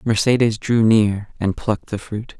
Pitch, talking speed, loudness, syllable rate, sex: 110 Hz, 175 wpm, -19 LUFS, 4.6 syllables/s, male